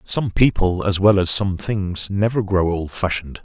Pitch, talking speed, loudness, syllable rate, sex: 95 Hz, 175 wpm, -19 LUFS, 4.5 syllables/s, male